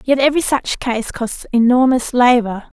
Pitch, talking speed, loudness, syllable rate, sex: 245 Hz, 150 wpm, -15 LUFS, 4.7 syllables/s, female